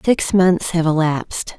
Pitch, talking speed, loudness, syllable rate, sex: 170 Hz, 150 wpm, -17 LUFS, 4.1 syllables/s, female